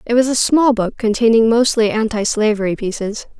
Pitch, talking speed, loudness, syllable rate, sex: 225 Hz, 160 wpm, -15 LUFS, 5.3 syllables/s, female